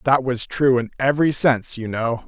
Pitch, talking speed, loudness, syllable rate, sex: 125 Hz, 210 wpm, -20 LUFS, 5.4 syllables/s, male